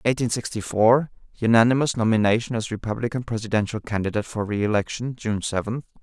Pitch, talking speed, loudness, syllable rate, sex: 115 Hz, 120 wpm, -23 LUFS, 6.2 syllables/s, male